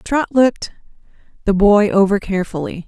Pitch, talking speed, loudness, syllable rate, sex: 205 Hz, 125 wpm, -16 LUFS, 5.6 syllables/s, female